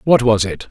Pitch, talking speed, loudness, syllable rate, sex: 115 Hz, 255 wpm, -15 LUFS, 5.1 syllables/s, male